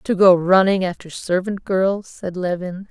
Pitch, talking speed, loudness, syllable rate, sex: 185 Hz, 165 wpm, -19 LUFS, 4.3 syllables/s, female